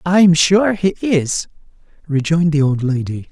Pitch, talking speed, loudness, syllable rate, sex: 165 Hz, 145 wpm, -16 LUFS, 4.3 syllables/s, male